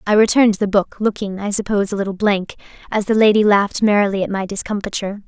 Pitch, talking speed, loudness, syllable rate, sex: 205 Hz, 205 wpm, -17 LUFS, 6.7 syllables/s, female